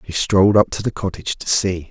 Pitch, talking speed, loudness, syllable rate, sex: 95 Hz, 250 wpm, -18 LUFS, 6.1 syllables/s, male